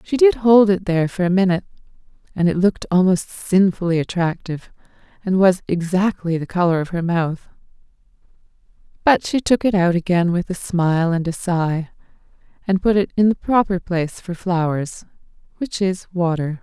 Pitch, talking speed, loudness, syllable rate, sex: 180 Hz, 165 wpm, -19 LUFS, 5.3 syllables/s, female